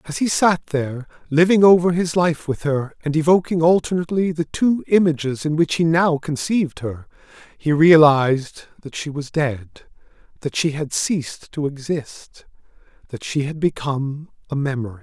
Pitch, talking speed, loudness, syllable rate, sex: 155 Hz, 160 wpm, -19 LUFS, 4.9 syllables/s, male